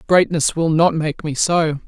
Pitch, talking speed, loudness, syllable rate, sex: 160 Hz, 190 wpm, -17 LUFS, 4.1 syllables/s, female